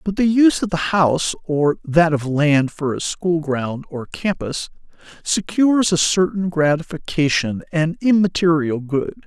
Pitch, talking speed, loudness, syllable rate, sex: 165 Hz, 150 wpm, -18 LUFS, 4.4 syllables/s, male